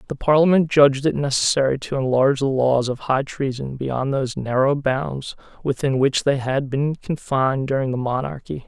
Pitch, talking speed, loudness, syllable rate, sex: 135 Hz, 175 wpm, -20 LUFS, 5.1 syllables/s, male